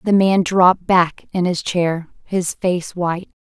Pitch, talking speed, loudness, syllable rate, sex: 180 Hz, 170 wpm, -18 LUFS, 4.0 syllables/s, female